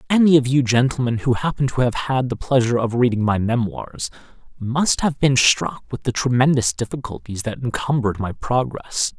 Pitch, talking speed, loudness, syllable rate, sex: 125 Hz, 175 wpm, -20 LUFS, 5.2 syllables/s, male